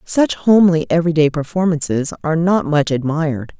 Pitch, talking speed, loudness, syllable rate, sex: 160 Hz, 135 wpm, -16 LUFS, 5.7 syllables/s, female